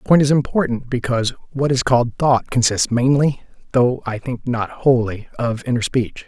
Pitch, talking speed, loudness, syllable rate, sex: 125 Hz, 180 wpm, -19 LUFS, 4.6 syllables/s, male